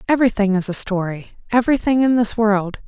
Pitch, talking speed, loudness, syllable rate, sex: 215 Hz, 145 wpm, -18 LUFS, 6.0 syllables/s, female